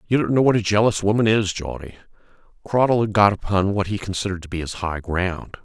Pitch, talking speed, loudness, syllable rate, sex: 100 Hz, 225 wpm, -20 LUFS, 6.1 syllables/s, male